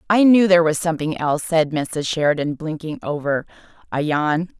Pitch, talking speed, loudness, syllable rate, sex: 160 Hz, 170 wpm, -19 LUFS, 5.4 syllables/s, female